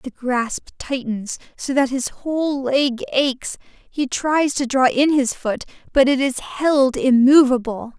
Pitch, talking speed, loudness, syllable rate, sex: 265 Hz, 160 wpm, -19 LUFS, 3.9 syllables/s, female